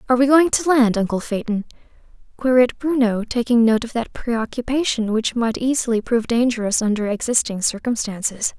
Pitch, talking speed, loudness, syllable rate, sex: 235 Hz, 155 wpm, -19 LUFS, 5.5 syllables/s, female